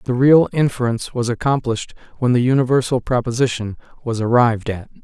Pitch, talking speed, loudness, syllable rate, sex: 125 Hz, 145 wpm, -18 LUFS, 6.1 syllables/s, male